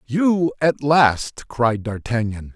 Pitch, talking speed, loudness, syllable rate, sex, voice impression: 130 Hz, 120 wpm, -19 LUFS, 3.0 syllables/s, male, masculine, adult-like, thick, tensed, slightly weak, hard, slightly muffled, cool, intellectual, calm, reassuring, wild, lively, slightly strict